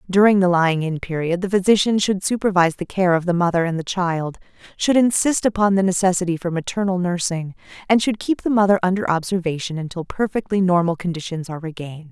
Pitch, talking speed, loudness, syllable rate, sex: 180 Hz, 190 wpm, -19 LUFS, 6.2 syllables/s, female